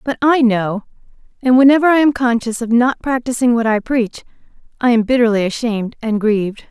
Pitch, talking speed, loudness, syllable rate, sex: 235 Hz, 180 wpm, -15 LUFS, 5.6 syllables/s, female